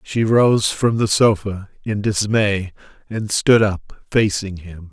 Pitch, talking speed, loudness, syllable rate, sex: 105 Hz, 145 wpm, -18 LUFS, 3.5 syllables/s, male